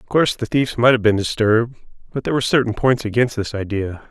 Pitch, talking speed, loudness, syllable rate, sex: 115 Hz, 235 wpm, -18 LUFS, 6.7 syllables/s, male